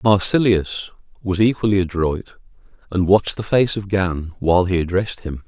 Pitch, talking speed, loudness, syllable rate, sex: 95 Hz, 155 wpm, -19 LUFS, 5.4 syllables/s, male